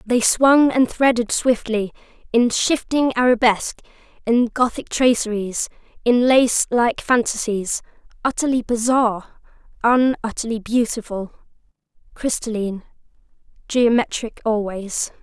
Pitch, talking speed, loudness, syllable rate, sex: 235 Hz, 85 wpm, -19 LUFS, 4.4 syllables/s, female